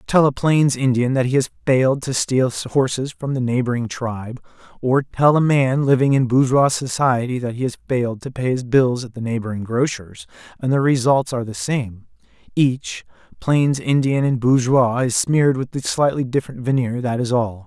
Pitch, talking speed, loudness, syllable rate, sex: 130 Hz, 190 wpm, -19 LUFS, 5.0 syllables/s, male